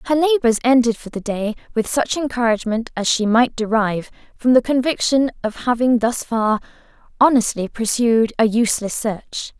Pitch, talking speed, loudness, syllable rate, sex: 235 Hz, 155 wpm, -18 LUFS, 5.1 syllables/s, female